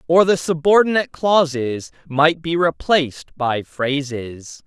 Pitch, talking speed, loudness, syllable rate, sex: 150 Hz, 115 wpm, -18 LUFS, 3.9 syllables/s, male